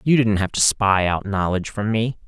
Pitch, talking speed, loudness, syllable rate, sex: 105 Hz, 240 wpm, -20 LUFS, 5.2 syllables/s, male